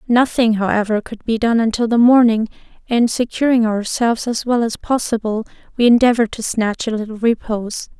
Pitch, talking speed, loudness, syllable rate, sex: 225 Hz, 165 wpm, -17 LUFS, 5.5 syllables/s, female